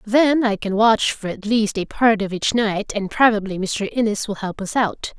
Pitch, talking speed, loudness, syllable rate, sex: 215 Hz, 230 wpm, -19 LUFS, 4.6 syllables/s, female